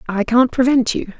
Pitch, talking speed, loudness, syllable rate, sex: 240 Hz, 200 wpm, -16 LUFS, 5.0 syllables/s, female